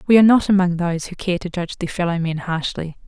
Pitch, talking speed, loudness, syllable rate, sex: 180 Hz, 255 wpm, -19 LUFS, 6.8 syllables/s, female